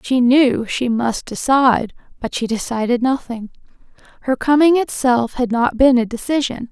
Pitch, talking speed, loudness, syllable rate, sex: 250 Hz, 150 wpm, -17 LUFS, 4.7 syllables/s, female